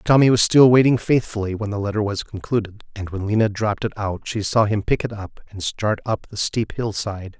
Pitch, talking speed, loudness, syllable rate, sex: 105 Hz, 225 wpm, -20 LUFS, 5.6 syllables/s, male